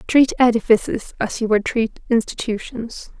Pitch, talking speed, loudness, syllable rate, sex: 230 Hz, 130 wpm, -19 LUFS, 4.6 syllables/s, female